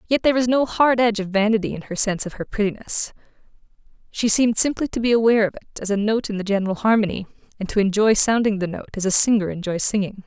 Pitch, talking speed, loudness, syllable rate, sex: 210 Hz, 235 wpm, -20 LUFS, 7.0 syllables/s, female